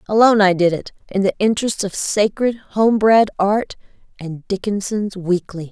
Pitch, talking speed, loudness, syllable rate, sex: 200 Hz, 160 wpm, -17 LUFS, 4.7 syllables/s, female